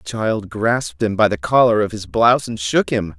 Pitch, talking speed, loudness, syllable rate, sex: 105 Hz, 245 wpm, -18 LUFS, 5.1 syllables/s, male